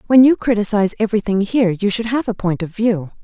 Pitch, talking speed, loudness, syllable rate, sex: 215 Hz, 225 wpm, -17 LUFS, 6.6 syllables/s, female